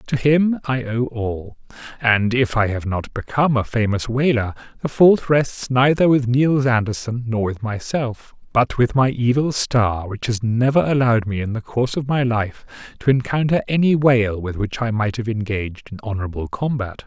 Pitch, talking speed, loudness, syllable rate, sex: 120 Hz, 185 wpm, -19 LUFS, 4.9 syllables/s, male